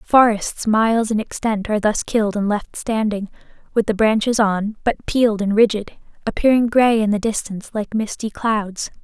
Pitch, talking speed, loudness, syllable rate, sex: 215 Hz, 175 wpm, -19 LUFS, 4.9 syllables/s, female